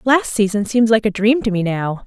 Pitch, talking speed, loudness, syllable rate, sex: 215 Hz, 260 wpm, -17 LUFS, 5.1 syllables/s, female